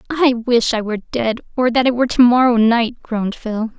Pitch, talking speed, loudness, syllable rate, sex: 235 Hz, 205 wpm, -16 LUFS, 5.3 syllables/s, female